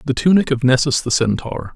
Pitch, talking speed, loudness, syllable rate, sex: 135 Hz, 205 wpm, -16 LUFS, 5.7 syllables/s, male